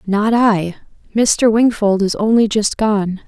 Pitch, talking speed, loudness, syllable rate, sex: 210 Hz, 145 wpm, -15 LUFS, 3.7 syllables/s, female